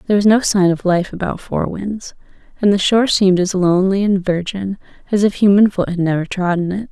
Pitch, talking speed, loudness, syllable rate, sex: 190 Hz, 215 wpm, -16 LUFS, 5.8 syllables/s, female